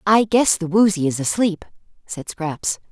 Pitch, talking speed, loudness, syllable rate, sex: 185 Hz, 165 wpm, -19 LUFS, 4.2 syllables/s, female